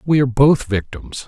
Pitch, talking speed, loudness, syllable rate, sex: 130 Hz, 190 wpm, -16 LUFS, 5.1 syllables/s, male